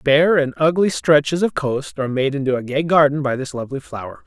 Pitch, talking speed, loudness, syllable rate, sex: 140 Hz, 225 wpm, -18 LUFS, 5.8 syllables/s, male